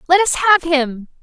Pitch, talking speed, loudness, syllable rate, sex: 315 Hz, 195 wpm, -15 LUFS, 4.3 syllables/s, female